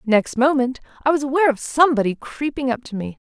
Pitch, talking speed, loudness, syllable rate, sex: 260 Hz, 200 wpm, -20 LUFS, 6.3 syllables/s, female